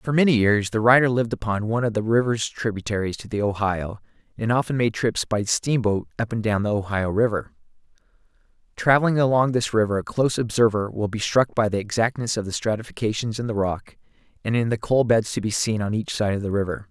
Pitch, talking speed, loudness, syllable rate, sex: 110 Hz, 215 wpm, -22 LUFS, 6.0 syllables/s, male